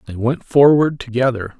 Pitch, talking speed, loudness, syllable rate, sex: 130 Hz, 150 wpm, -16 LUFS, 4.9 syllables/s, male